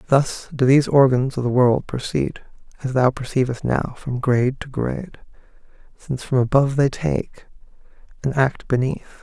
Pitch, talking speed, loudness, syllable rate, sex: 130 Hz, 155 wpm, -20 LUFS, 5.0 syllables/s, male